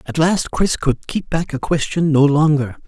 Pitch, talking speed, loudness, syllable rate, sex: 150 Hz, 210 wpm, -17 LUFS, 4.4 syllables/s, male